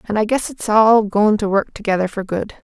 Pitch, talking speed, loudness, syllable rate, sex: 210 Hz, 245 wpm, -17 LUFS, 5.3 syllables/s, female